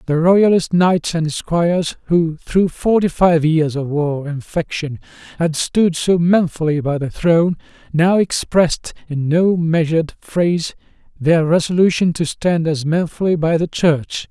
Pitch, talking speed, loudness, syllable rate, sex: 165 Hz, 150 wpm, -17 LUFS, 4.3 syllables/s, male